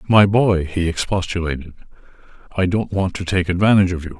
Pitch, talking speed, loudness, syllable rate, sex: 90 Hz, 170 wpm, -18 LUFS, 6.2 syllables/s, male